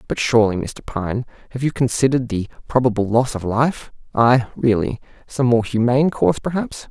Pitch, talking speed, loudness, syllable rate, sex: 120 Hz, 150 wpm, -19 LUFS, 5.4 syllables/s, male